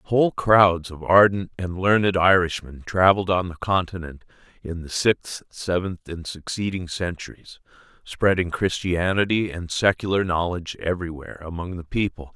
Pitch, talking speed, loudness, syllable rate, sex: 90 Hz, 130 wpm, -22 LUFS, 4.9 syllables/s, male